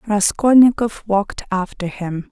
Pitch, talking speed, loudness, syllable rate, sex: 205 Hz, 105 wpm, -17 LUFS, 4.4 syllables/s, female